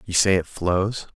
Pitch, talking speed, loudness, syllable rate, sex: 95 Hz, 200 wpm, -22 LUFS, 4.0 syllables/s, male